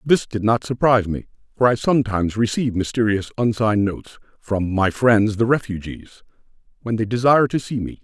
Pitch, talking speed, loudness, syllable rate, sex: 110 Hz, 170 wpm, -20 LUFS, 5.8 syllables/s, male